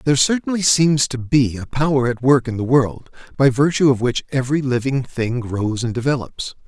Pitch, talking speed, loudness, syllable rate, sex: 130 Hz, 200 wpm, -18 LUFS, 5.2 syllables/s, male